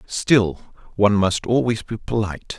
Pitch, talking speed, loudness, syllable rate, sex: 105 Hz, 140 wpm, -20 LUFS, 4.4 syllables/s, male